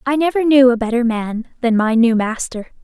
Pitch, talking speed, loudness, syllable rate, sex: 245 Hz, 210 wpm, -16 LUFS, 5.4 syllables/s, female